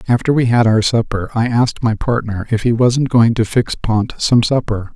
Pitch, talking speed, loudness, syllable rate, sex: 115 Hz, 220 wpm, -15 LUFS, 5.0 syllables/s, male